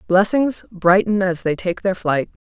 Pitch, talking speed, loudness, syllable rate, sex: 190 Hz, 175 wpm, -18 LUFS, 4.3 syllables/s, female